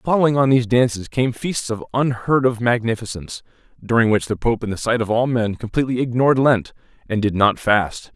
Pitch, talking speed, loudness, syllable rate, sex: 120 Hz, 200 wpm, -19 LUFS, 5.7 syllables/s, male